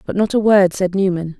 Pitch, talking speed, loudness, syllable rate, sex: 190 Hz, 260 wpm, -16 LUFS, 5.5 syllables/s, female